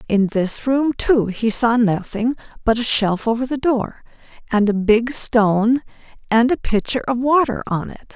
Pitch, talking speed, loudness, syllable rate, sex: 230 Hz, 175 wpm, -18 LUFS, 4.4 syllables/s, female